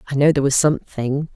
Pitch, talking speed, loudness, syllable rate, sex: 140 Hz, 220 wpm, -18 LUFS, 7.3 syllables/s, female